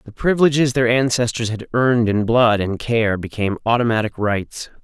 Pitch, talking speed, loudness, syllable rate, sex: 115 Hz, 160 wpm, -18 LUFS, 5.4 syllables/s, male